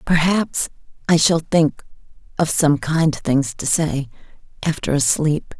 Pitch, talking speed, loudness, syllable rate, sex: 150 Hz, 130 wpm, -19 LUFS, 3.7 syllables/s, female